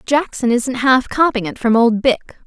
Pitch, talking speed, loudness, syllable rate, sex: 245 Hz, 195 wpm, -16 LUFS, 4.8 syllables/s, female